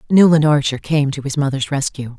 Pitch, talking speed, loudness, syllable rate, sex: 145 Hz, 190 wpm, -16 LUFS, 5.5 syllables/s, female